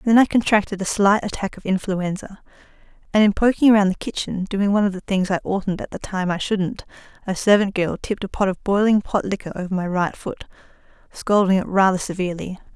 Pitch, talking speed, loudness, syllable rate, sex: 195 Hz, 205 wpm, -20 LUFS, 6.0 syllables/s, female